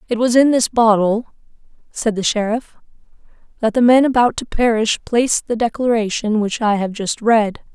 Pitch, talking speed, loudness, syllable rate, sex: 225 Hz, 170 wpm, -16 LUFS, 4.9 syllables/s, female